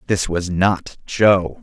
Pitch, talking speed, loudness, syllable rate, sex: 105 Hz, 150 wpm, -18 LUFS, 2.9 syllables/s, male